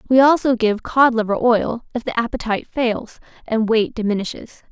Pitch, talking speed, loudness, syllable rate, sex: 230 Hz, 165 wpm, -19 LUFS, 5.2 syllables/s, female